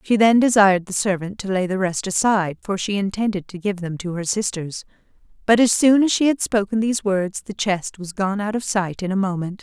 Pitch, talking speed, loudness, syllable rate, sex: 200 Hz, 235 wpm, -20 LUFS, 5.5 syllables/s, female